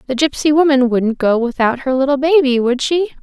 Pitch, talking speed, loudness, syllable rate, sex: 270 Hz, 205 wpm, -15 LUFS, 5.4 syllables/s, female